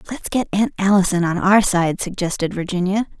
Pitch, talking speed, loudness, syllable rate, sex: 190 Hz, 170 wpm, -18 LUFS, 5.4 syllables/s, female